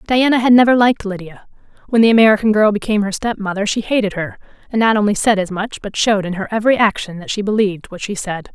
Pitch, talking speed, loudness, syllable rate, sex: 210 Hz, 230 wpm, -16 LUFS, 6.8 syllables/s, female